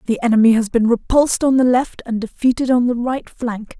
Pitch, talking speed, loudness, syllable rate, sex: 240 Hz, 220 wpm, -17 LUFS, 5.6 syllables/s, female